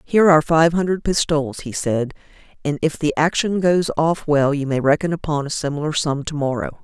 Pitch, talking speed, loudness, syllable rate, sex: 155 Hz, 200 wpm, -19 LUFS, 5.6 syllables/s, female